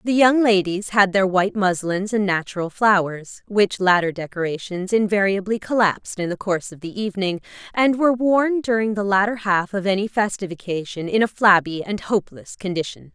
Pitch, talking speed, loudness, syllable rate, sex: 200 Hz, 175 wpm, -20 LUFS, 5.5 syllables/s, female